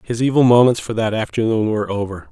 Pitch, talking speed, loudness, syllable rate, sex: 110 Hz, 205 wpm, -17 LUFS, 6.4 syllables/s, male